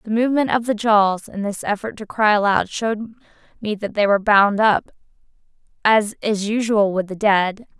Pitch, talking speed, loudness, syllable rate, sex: 210 Hz, 185 wpm, -19 LUFS, 5.0 syllables/s, female